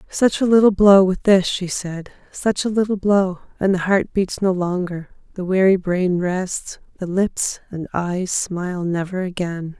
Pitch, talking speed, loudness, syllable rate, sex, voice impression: 185 Hz, 170 wpm, -19 LUFS, 4.2 syllables/s, female, very feminine, slightly young, slightly adult-like, very thin, very relaxed, very weak, dark, very soft, muffled, slightly halting, slightly raspy, very cute, intellectual, slightly refreshing, very sincere, very calm, very friendly, very reassuring, unique, very elegant, sweet, very kind, very modest